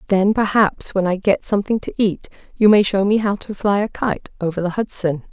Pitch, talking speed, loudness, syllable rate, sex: 200 Hz, 225 wpm, -18 LUFS, 5.3 syllables/s, female